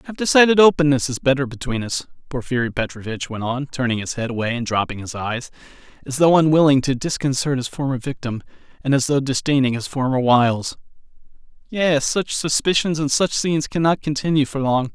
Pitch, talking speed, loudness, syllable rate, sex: 135 Hz, 175 wpm, -19 LUFS, 5.8 syllables/s, male